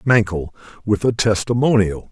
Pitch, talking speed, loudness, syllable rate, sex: 105 Hz, 115 wpm, -18 LUFS, 4.7 syllables/s, male